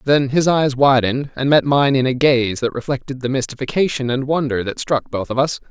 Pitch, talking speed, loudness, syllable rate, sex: 135 Hz, 220 wpm, -18 LUFS, 5.5 syllables/s, male